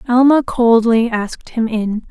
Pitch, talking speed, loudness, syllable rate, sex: 235 Hz, 145 wpm, -15 LUFS, 4.2 syllables/s, female